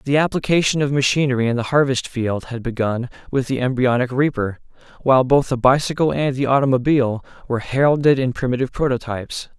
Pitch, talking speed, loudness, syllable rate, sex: 130 Hz, 165 wpm, -19 LUFS, 6.2 syllables/s, male